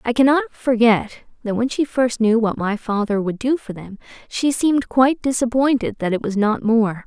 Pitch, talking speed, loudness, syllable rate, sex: 235 Hz, 205 wpm, -19 LUFS, 5.1 syllables/s, female